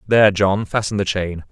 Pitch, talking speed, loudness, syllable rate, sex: 100 Hz, 200 wpm, -18 LUFS, 5.3 syllables/s, male